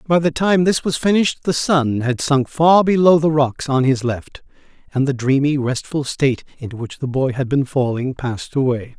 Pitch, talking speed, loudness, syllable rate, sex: 140 Hz, 205 wpm, -18 LUFS, 5.0 syllables/s, male